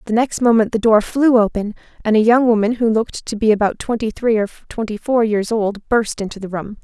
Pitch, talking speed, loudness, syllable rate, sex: 220 Hz, 235 wpm, -17 LUFS, 5.5 syllables/s, female